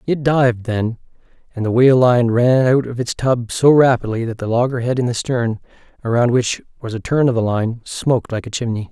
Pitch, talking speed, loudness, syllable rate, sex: 120 Hz, 215 wpm, -17 LUFS, 5.4 syllables/s, male